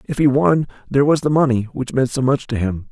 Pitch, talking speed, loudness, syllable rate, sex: 130 Hz, 265 wpm, -18 LUFS, 5.8 syllables/s, male